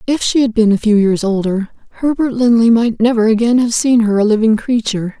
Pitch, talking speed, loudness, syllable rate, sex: 225 Hz, 220 wpm, -13 LUFS, 5.7 syllables/s, female